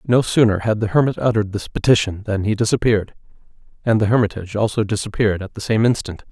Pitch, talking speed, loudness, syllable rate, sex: 110 Hz, 190 wpm, -19 LUFS, 6.9 syllables/s, male